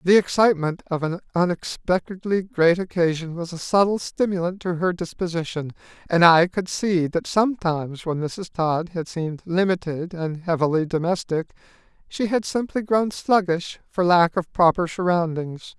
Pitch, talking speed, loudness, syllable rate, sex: 175 Hz, 150 wpm, -22 LUFS, 4.8 syllables/s, male